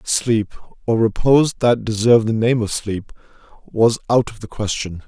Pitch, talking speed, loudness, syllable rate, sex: 115 Hz, 165 wpm, -18 LUFS, 4.8 syllables/s, male